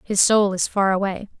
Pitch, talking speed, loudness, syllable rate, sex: 200 Hz, 215 wpm, -19 LUFS, 4.9 syllables/s, female